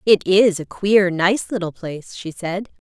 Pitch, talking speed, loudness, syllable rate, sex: 185 Hz, 190 wpm, -19 LUFS, 4.3 syllables/s, female